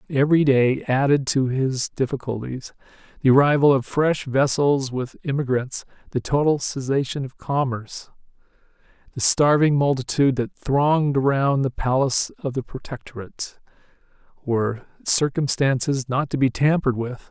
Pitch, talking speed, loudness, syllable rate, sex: 135 Hz, 125 wpm, -21 LUFS, 5.0 syllables/s, male